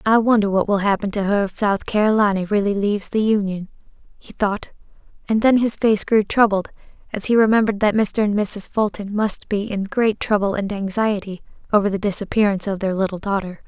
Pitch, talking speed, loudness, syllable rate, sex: 205 Hz, 195 wpm, -19 LUFS, 5.7 syllables/s, female